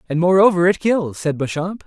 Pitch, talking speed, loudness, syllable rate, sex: 175 Hz, 195 wpm, -17 LUFS, 5.3 syllables/s, male